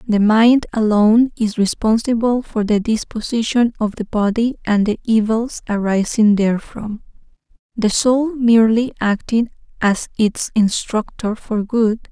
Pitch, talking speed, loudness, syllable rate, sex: 220 Hz, 125 wpm, -17 LUFS, 4.3 syllables/s, female